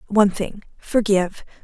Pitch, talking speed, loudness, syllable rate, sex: 200 Hz, 110 wpm, -21 LUFS, 5.1 syllables/s, female